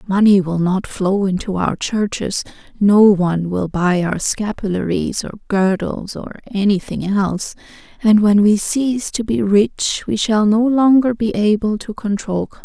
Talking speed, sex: 160 wpm, female